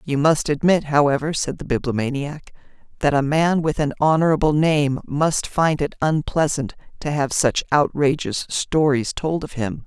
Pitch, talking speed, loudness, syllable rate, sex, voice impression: 145 Hz, 160 wpm, -20 LUFS, 4.6 syllables/s, female, feminine, adult-like, slightly intellectual, calm, slightly elegant